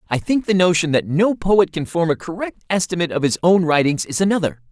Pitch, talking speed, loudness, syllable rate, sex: 170 Hz, 230 wpm, -18 LUFS, 6.0 syllables/s, male